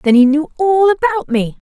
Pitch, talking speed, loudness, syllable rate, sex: 310 Hz, 210 wpm, -14 LUFS, 5.7 syllables/s, female